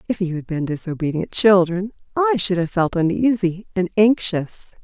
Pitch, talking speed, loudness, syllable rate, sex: 190 Hz, 160 wpm, -19 LUFS, 4.8 syllables/s, female